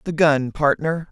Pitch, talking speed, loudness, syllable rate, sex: 150 Hz, 160 wpm, -19 LUFS, 4.0 syllables/s, male